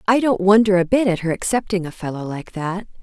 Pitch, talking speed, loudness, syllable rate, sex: 195 Hz, 240 wpm, -19 LUFS, 5.8 syllables/s, female